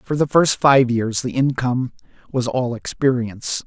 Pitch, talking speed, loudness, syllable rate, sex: 125 Hz, 165 wpm, -19 LUFS, 4.6 syllables/s, male